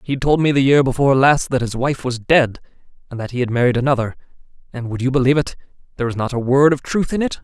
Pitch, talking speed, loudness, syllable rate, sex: 130 Hz, 260 wpm, -17 LUFS, 6.9 syllables/s, male